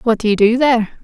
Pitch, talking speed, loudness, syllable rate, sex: 230 Hz, 290 wpm, -14 LUFS, 7.3 syllables/s, female